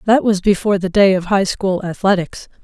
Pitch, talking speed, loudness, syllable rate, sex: 195 Hz, 180 wpm, -16 LUFS, 5.5 syllables/s, female